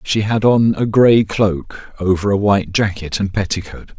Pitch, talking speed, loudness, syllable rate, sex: 100 Hz, 180 wpm, -16 LUFS, 4.4 syllables/s, male